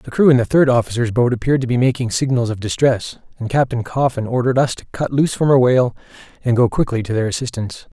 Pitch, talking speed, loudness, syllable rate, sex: 125 Hz, 235 wpm, -17 LUFS, 6.7 syllables/s, male